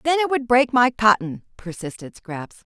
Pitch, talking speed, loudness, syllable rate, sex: 230 Hz, 175 wpm, -19 LUFS, 4.8 syllables/s, female